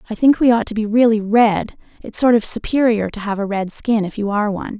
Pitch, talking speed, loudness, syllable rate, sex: 220 Hz, 265 wpm, -17 LUFS, 6.0 syllables/s, female